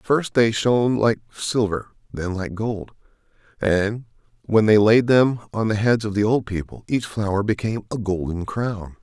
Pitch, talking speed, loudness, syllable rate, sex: 110 Hz, 175 wpm, -21 LUFS, 4.6 syllables/s, male